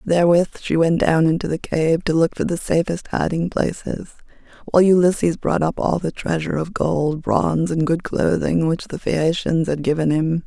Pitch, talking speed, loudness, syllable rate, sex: 165 Hz, 190 wpm, -19 LUFS, 5.0 syllables/s, female